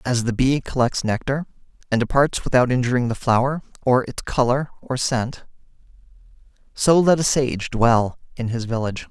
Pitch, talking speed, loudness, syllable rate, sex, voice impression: 125 Hz, 160 wpm, -21 LUFS, 5.0 syllables/s, male, masculine, adult-like, refreshing, sincere, slightly friendly